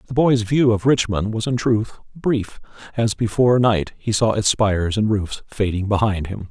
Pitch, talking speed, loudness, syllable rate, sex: 110 Hz, 195 wpm, -19 LUFS, 4.7 syllables/s, male